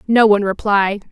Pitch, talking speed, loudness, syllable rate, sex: 205 Hz, 160 wpm, -15 LUFS, 5.2 syllables/s, female